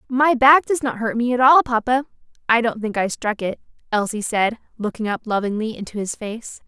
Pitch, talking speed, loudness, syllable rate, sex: 235 Hz, 205 wpm, -20 LUFS, 5.3 syllables/s, female